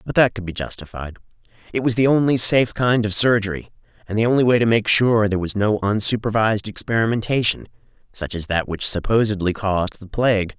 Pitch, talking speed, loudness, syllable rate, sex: 110 Hz, 185 wpm, -19 LUFS, 6.1 syllables/s, male